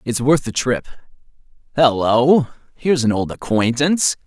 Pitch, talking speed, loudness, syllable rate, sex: 130 Hz, 125 wpm, -17 LUFS, 4.4 syllables/s, male